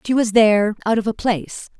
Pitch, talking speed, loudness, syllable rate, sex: 215 Hz, 235 wpm, -18 LUFS, 6.0 syllables/s, female